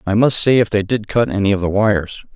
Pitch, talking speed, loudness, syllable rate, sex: 105 Hz, 280 wpm, -16 LUFS, 6.0 syllables/s, male